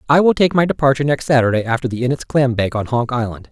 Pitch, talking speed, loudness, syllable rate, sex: 130 Hz, 255 wpm, -17 LUFS, 6.9 syllables/s, male